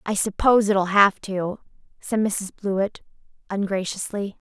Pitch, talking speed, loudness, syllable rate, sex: 200 Hz, 120 wpm, -22 LUFS, 4.5 syllables/s, female